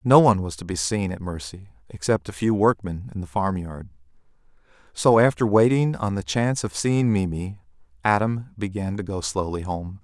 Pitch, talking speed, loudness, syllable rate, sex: 100 Hz, 180 wpm, -23 LUFS, 5.1 syllables/s, male